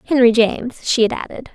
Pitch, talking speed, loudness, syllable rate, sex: 240 Hz, 195 wpm, -17 LUFS, 6.0 syllables/s, female